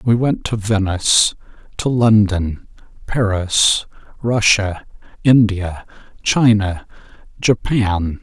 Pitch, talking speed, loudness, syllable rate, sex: 105 Hz, 75 wpm, -16 LUFS, 3.3 syllables/s, male